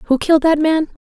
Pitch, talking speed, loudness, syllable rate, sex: 305 Hz, 235 wpm, -14 LUFS, 5.8 syllables/s, female